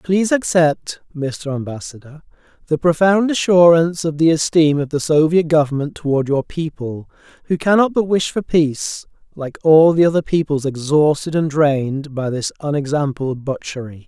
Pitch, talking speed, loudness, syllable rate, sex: 155 Hz, 150 wpm, -17 LUFS, 4.9 syllables/s, male